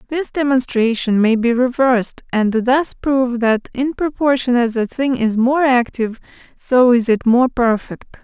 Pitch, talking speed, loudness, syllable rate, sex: 250 Hz, 160 wpm, -16 LUFS, 4.5 syllables/s, female